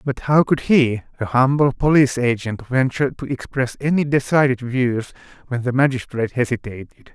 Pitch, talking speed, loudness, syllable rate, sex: 130 Hz, 150 wpm, -19 LUFS, 5.3 syllables/s, male